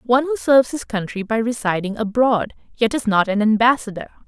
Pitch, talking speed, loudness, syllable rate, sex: 230 Hz, 180 wpm, -19 LUFS, 5.7 syllables/s, female